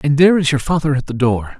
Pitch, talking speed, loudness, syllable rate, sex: 140 Hz, 300 wpm, -15 LUFS, 6.7 syllables/s, male